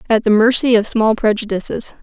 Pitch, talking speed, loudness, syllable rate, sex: 220 Hz, 180 wpm, -15 LUFS, 5.6 syllables/s, female